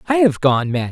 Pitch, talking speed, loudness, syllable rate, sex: 150 Hz, 260 wpm, -16 LUFS, 5.5 syllables/s, male